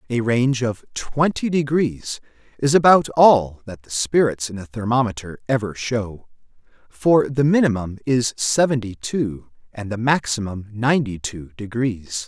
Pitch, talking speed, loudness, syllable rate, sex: 120 Hz, 135 wpm, -20 LUFS, 4.4 syllables/s, male